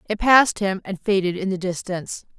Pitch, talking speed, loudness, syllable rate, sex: 195 Hz, 200 wpm, -21 LUFS, 5.8 syllables/s, female